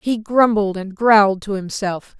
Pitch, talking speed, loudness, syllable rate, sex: 205 Hz, 165 wpm, -17 LUFS, 4.3 syllables/s, female